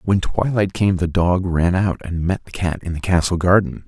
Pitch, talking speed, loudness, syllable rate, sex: 90 Hz, 230 wpm, -19 LUFS, 4.9 syllables/s, male